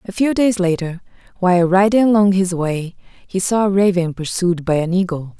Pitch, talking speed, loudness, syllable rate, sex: 185 Hz, 190 wpm, -17 LUFS, 5.1 syllables/s, female